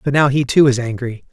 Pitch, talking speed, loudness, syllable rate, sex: 130 Hz, 275 wpm, -16 LUFS, 6.0 syllables/s, male